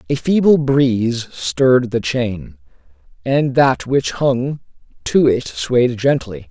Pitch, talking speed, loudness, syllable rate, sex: 125 Hz, 130 wpm, -16 LUFS, 3.5 syllables/s, male